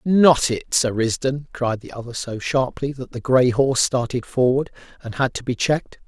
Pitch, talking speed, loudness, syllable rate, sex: 130 Hz, 195 wpm, -21 LUFS, 4.9 syllables/s, male